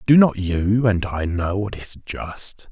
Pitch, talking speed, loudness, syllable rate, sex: 100 Hz, 200 wpm, -21 LUFS, 3.6 syllables/s, male